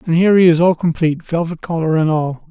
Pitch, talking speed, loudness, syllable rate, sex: 165 Hz, 240 wpm, -15 LUFS, 6.3 syllables/s, male